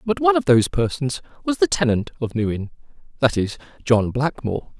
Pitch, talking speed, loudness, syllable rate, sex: 145 Hz, 175 wpm, -21 LUFS, 5.8 syllables/s, male